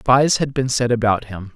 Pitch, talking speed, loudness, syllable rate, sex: 120 Hz, 230 wpm, -18 LUFS, 4.6 syllables/s, male